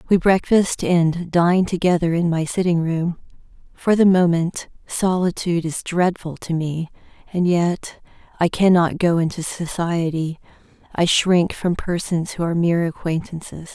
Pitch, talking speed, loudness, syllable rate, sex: 170 Hz, 140 wpm, -20 LUFS, 4.4 syllables/s, female